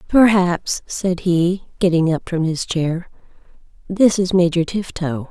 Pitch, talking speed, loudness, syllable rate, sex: 175 Hz, 135 wpm, -18 LUFS, 3.8 syllables/s, female